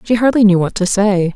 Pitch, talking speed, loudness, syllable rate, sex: 205 Hz, 265 wpm, -13 LUFS, 5.6 syllables/s, female